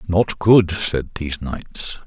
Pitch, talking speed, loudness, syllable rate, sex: 85 Hz, 145 wpm, -19 LUFS, 3.2 syllables/s, male